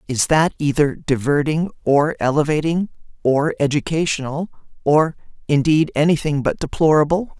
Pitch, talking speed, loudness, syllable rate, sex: 150 Hz, 105 wpm, -18 LUFS, 4.8 syllables/s, female